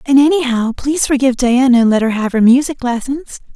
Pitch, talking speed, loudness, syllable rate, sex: 255 Hz, 205 wpm, -13 LUFS, 6.1 syllables/s, female